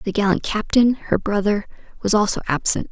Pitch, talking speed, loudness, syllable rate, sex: 205 Hz, 165 wpm, -20 LUFS, 5.3 syllables/s, female